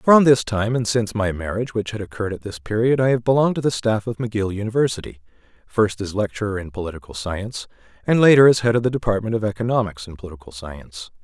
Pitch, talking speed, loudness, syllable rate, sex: 105 Hz, 215 wpm, -20 LUFS, 6.8 syllables/s, male